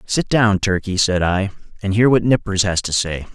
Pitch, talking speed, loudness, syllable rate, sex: 100 Hz, 215 wpm, -17 LUFS, 4.8 syllables/s, male